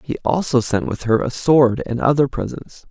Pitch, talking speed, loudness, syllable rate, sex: 130 Hz, 205 wpm, -18 LUFS, 4.8 syllables/s, male